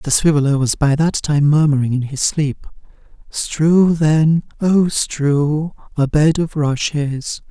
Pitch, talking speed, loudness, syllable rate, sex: 150 Hz, 145 wpm, -16 LUFS, 3.6 syllables/s, male